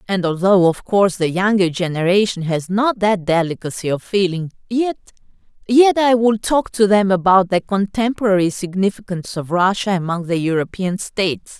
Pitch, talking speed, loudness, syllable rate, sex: 190 Hz, 155 wpm, -17 LUFS, 5.1 syllables/s, female